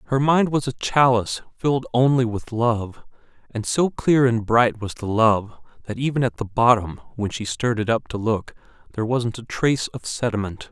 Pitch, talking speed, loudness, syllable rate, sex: 115 Hz, 195 wpm, -21 LUFS, 5.1 syllables/s, male